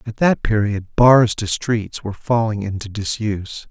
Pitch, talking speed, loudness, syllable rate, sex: 110 Hz, 160 wpm, -19 LUFS, 4.6 syllables/s, male